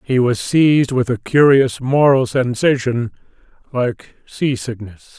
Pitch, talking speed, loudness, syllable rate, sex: 125 Hz, 115 wpm, -16 LUFS, 3.9 syllables/s, male